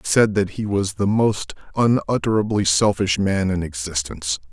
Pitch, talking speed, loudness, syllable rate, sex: 95 Hz, 160 wpm, -20 LUFS, 5.1 syllables/s, male